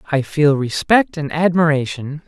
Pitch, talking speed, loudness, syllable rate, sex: 150 Hz, 130 wpm, -17 LUFS, 4.5 syllables/s, male